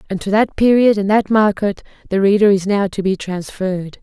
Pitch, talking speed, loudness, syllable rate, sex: 200 Hz, 210 wpm, -16 LUFS, 5.4 syllables/s, female